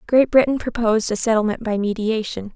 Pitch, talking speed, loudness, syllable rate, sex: 225 Hz, 165 wpm, -19 LUFS, 5.8 syllables/s, female